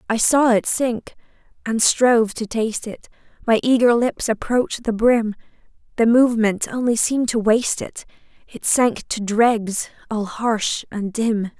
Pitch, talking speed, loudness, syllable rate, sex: 225 Hz, 155 wpm, -19 LUFS, 4.4 syllables/s, female